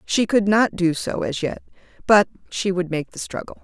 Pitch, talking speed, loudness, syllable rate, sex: 190 Hz, 215 wpm, -21 LUFS, 5.0 syllables/s, female